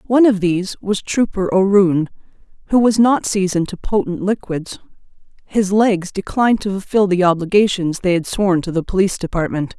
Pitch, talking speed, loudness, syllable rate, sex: 195 Hz, 165 wpm, -17 LUFS, 5.4 syllables/s, female